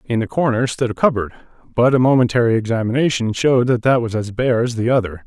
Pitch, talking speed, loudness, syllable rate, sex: 120 Hz, 205 wpm, -17 LUFS, 6.3 syllables/s, male